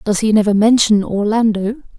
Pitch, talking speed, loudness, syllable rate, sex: 215 Hz, 150 wpm, -14 LUFS, 5.4 syllables/s, female